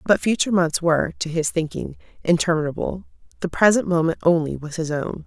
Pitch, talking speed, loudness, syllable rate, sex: 170 Hz, 170 wpm, -21 LUFS, 5.8 syllables/s, female